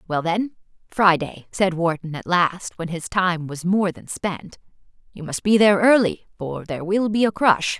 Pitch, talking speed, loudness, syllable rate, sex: 180 Hz, 185 wpm, -21 LUFS, 4.6 syllables/s, female